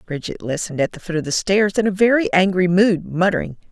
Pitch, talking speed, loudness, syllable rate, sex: 185 Hz, 225 wpm, -18 LUFS, 6.1 syllables/s, female